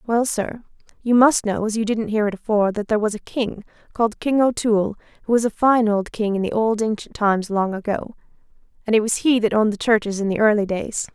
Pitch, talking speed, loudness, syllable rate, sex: 215 Hz, 235 wpm, -20 LUFS, 6.0 syllables/s, female